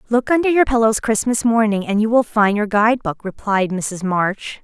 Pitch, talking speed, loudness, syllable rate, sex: 220 Hz, 195 wpm, -17 LUFS, 5.0 syllables/s, female